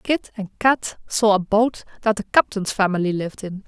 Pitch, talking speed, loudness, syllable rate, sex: 205 Hz, 195 wpm, -21 LUFS, 4.8 syllables/s, female